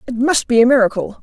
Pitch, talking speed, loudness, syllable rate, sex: 240 Hz, 245 wpm, -14 LUFS, 6.5 syllables/s, female